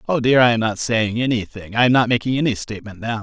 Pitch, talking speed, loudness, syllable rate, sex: 115 Hz, 260 wpm, -18 LUFS, 6.5 syllables/s, male